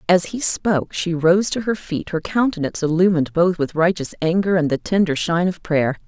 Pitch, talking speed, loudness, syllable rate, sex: 170 Hz, 205 wpm, -19 LUFS, 5.5 syllables/s, female